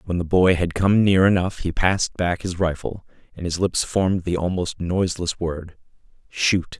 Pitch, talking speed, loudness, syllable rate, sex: 90 Hz, 185 wpm, -21 LUFS, 4.8 syllables/s, male